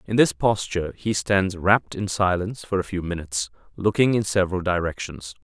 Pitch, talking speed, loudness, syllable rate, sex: 95 Hz, 175 wpm, -23 LUFS, 5.5 syllables/s, male